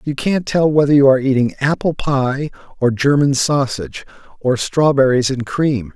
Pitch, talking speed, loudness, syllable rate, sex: 135 Hz, 160 wpm, -16 LUFS, 4.8 syllables/s, male